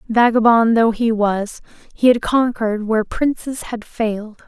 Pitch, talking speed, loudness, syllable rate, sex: 225 Hz, 150 wpm, -17 LUFS, 4.6 syllables/s, female